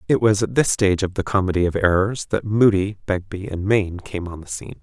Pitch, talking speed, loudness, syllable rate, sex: 95 Hz, 235 wpm, -20 LUFS, 5.9 syllables/s, male